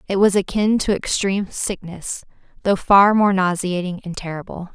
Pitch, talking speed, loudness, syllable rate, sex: 190 Hz, 150 wpm, -19 LUFS, 4.9 syllables/s, female